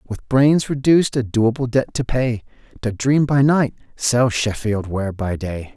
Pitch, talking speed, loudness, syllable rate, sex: 120 Hz, 175 wpm, -19 LUFS, 4.1 syllables/s, male